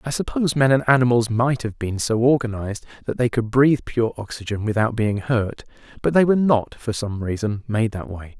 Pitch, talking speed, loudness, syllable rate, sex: 120 Hz, 205 wpm, -21 LUFS, 5.5 syllables/s, male